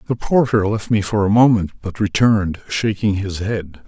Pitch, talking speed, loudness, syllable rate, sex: 105 Hz, 185 wpm, -18 LUFS, 4.9 syllables/s, male